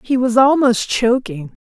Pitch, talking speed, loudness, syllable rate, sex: 240 Hz, 145 wpm, -15 LUFS, 4.1 syllables/s, female